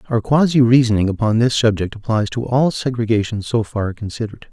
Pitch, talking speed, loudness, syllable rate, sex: 115 Hz, 175 wpm, -17 LUFS, 5.7 syllables/s, male